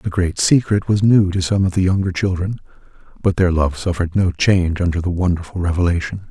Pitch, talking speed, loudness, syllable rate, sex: 90 Hz, 200 wpm, -18 LUFS, 5.9 syllables/s, male